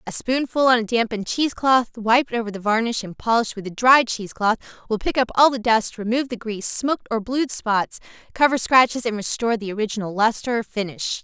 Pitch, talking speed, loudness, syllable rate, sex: 230 Hz, 215 wpm, -21 LUFS, 6.0 syllables/s, female